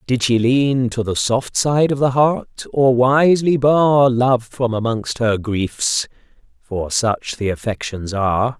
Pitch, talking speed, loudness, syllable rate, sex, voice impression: 125 Hz, 155 wpm, -17 LUFS, 3.8 syllables/s, male, masculine, middle-aged, tensed, powerful, slightly bright, slightly soft, slightly raspy, calm, mature, friendly, slightly unique, wild, lively